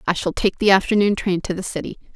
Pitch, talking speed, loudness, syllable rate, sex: 190 Hz, 250 wpm, -19 LUFS, 6.5 syllables/s, female